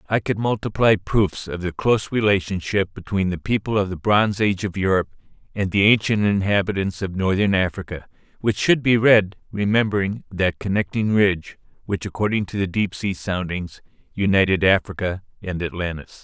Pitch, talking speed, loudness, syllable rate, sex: 100 Hz, 155 wpm, -21 LUFS, 5.4 syllables/s, male